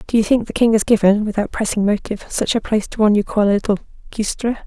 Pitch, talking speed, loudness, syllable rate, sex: 215 Hz, 255 wpm, -18 LUFS, 7.1 syllables/s, female